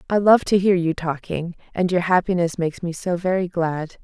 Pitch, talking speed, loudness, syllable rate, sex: 175 Hz, 210 wpm, -21 LUFS, 5.2 syllables/s, female